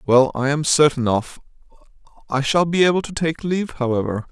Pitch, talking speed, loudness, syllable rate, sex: 145 Hz, 165 wpm, -19 LUFS, 5.6 syllables/s, male